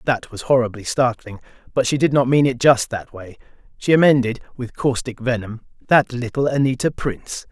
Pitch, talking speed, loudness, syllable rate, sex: 125 Hz, 175 wpm, -19 LUFS, 5.3 syllables/s, male